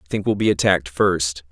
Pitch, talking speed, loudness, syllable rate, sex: 90 Hz, 235 wpm, -19 LUFS, 6.3 syllables/s, male